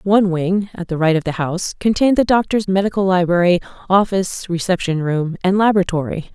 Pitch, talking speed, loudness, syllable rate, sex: 185 Hz, 170 wpm, -17 LUFS, 6.1 syllables/s, female